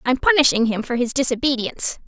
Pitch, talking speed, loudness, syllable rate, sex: 255 Hz, 175 wpm, -19 LUFS, 6.2 syllables/s, female